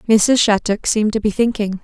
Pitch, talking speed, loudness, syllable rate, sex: 215 Hz, 195 wpm, -16 LUFS, 5.5 syllables/s, female